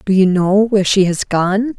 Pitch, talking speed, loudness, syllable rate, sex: 195 Hz, 235 wpm, -14 LUFS, 4.7 syllables/s, female